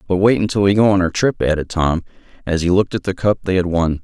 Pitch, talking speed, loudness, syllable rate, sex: 95 Hz, 285 wpm, -17 LUFS, 6.5 syllables/s, male